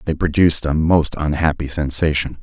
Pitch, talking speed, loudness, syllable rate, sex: 75 Hz, 150 wpm, -17 LUFS, 5.4 syllables/s, male